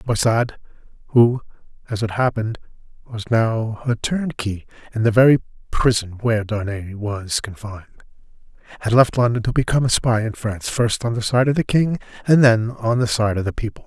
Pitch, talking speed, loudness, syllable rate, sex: 115 Hz, 175 wpm, -19 LUFS, 3.3 syllables/s, male